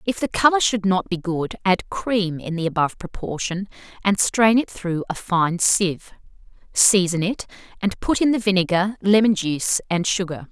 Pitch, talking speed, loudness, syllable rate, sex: 190 Hz, 175 wpm, -20 LUFS, 4.9 syllables/s, female